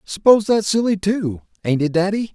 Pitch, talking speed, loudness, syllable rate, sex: 190 Hz, 180 wpm, -18 LUFS, 5.0 syllables/s, male